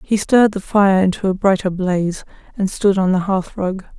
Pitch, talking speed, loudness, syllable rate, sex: 190 Hz, 195 wpm, -17 LUFS, 5.2 syllables/s, female